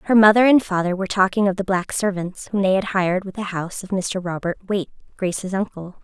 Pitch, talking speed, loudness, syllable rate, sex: 190 Hz, 230 wpm, -20 LUFS, 6.2 syllables/s, female